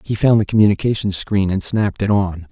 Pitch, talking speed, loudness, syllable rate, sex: 100 Hz, 215 wpm, -17 LUFS, 5.8 syllables/s, male